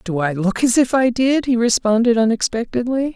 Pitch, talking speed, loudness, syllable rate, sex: 235 Hz, 190 wpm, -17 LUFS, 5.3 syllables/s, female